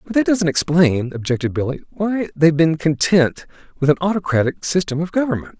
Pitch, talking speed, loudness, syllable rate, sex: 165 Hz, 170 wpm, -18 LUFS, 5.7 syllables/s, male